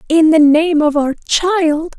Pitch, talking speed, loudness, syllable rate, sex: 315 Hz, 180 wpm, -13 LUFS, 3.3 syllables/s, female